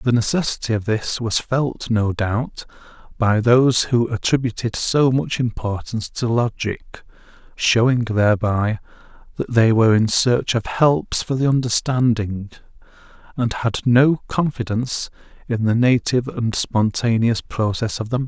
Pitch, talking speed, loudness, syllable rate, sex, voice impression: 115 Hz, 140 wpm, -19 LUFS, 4.4 syllables/s, male, masculine, middle-aged, relaxed, muffled, halting, slightly raspy, calm, mature, friendly, slightly reassuring, kind, modest